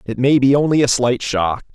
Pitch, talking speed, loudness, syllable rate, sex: 130 Hz, 240 wpm, -16 LUFS, 5.2 syllables/s, male